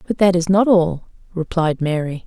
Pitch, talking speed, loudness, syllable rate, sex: 175 Hz, 185 wpm, -18 LUFS, 4.8 syllables/s, female